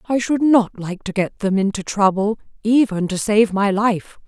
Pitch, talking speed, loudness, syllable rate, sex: 210 Hz, 195 wpm, -18 LUFS, 4.4 syllables/s, female